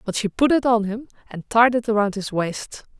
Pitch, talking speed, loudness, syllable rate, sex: 220 Hz, 240 wpm, -20 LUFS, 5.1 syllables/s, female